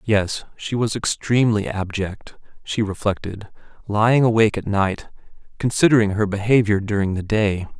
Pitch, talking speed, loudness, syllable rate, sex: 105 Hz, 130 wpm, -20 LUFS, 5.0 syllables/s, male